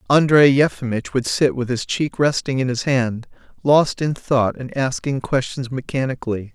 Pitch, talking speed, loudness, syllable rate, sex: 130 Hz, 165 wpm, -19 LUFS, 4.7 syllables/s, male